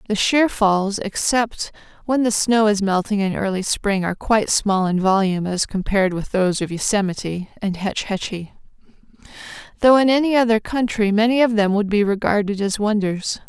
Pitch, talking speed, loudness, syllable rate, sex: 205 Hz, 175 wpm, -19 LUFS, 5.2 syllables/s, female